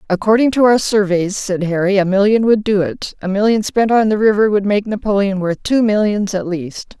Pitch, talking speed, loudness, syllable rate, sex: 200 Hz, 215 wpm, -15 LUFS, 5.2 syllables/s, female